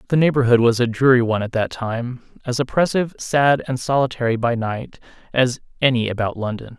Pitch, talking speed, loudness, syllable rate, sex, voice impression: 125 Hz, 175 wpm, -19 LUFS, 5.7 syllables/s, male, masculine, adult-like, tensed, powerful, slightly bright, slightly muffled, slightly nasal, cool, intellectual, calm, slightly friendly, reassuring, kind, modest